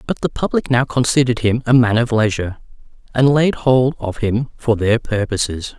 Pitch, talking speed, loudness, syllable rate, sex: 120 Hz, 185 wpm, -17 LUFS, 5.2 syllables/s, male